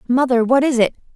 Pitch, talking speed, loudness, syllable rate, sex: 250 Hz, 205 wpm, -16 LUFS, 6.1 syllables/s, female